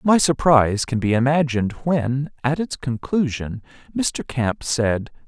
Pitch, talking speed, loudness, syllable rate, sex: 135 Hz, 135 wpm, -21 LUFS, 4.2 syllables/s, male